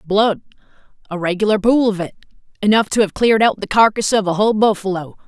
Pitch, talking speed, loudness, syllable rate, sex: 205 Hz, 180 wpm, -16 LUFS, 6.0 syllables/s, female